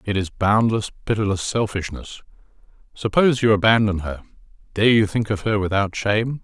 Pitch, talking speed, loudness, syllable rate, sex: 105 Hz, 150 wpm, -20 LUFS, 5.5 syllables/s, male